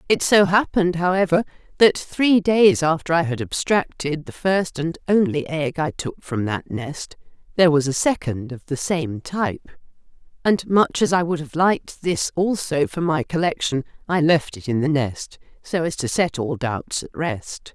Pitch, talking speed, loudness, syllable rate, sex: 160 Hz, 185 wpm, -21 LUFS, 4.5 syllables/s, female